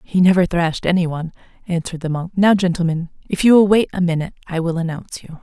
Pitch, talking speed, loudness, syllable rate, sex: 175 Hz, 220 wpm, -18 LUFS, 7.0 syllables/s, female